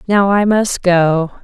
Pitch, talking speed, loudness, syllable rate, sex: 190 Hz, 170 wpm, -13 LUFS, 3.3 syllables/s, female